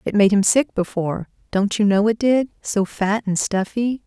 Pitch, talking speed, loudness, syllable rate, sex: 210 Hz, 190 wpm, -20 LUFS, 4.8 syllables/s, female